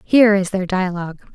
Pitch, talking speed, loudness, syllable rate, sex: 190 Hz, 180 wpm, -17 LUFS, 6.2 syllables/s, female